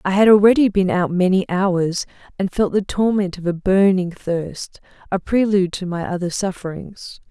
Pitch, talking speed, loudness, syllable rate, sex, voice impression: 190 Hz, 170 wpm, -18 LUFS, 4.8 syllables/s, female, feminine, adult-like, slightly dark, slightly clear, slightly intellectual, calm